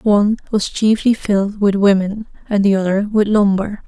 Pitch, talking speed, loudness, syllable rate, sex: 205 Hz, 170 wpm, -16 LUFS, 5.0 syllables/s, female